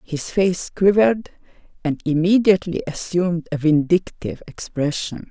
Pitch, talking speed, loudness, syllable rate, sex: 175 Hz, 100 wpm, -20 LUFS, 4.9 syllables/s, female